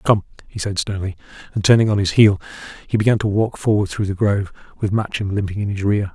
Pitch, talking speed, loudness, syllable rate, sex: 100 Hz, 225 wpm, -19 LUFS, 6.4 syllables/s, male